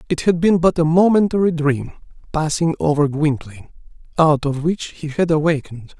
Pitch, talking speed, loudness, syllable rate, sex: 155 Hz, 160 wpm, -18 LUFS, 5.3 syllables/s, male